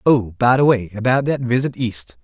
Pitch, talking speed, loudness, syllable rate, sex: 120 Hz, 190 wpm, -18 LUFS, 4.9 syllables/s, male